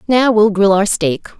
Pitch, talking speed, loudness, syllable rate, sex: 205 Hz, 215 wpm, -13 LUFS, 4.4 syllables/s, female